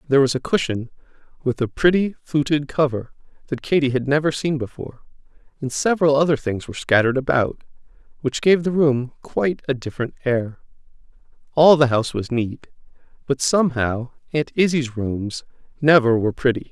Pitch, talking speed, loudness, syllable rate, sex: 135 Hz, 155 wpm, -20 LUFS, 5.6 syllables/s, male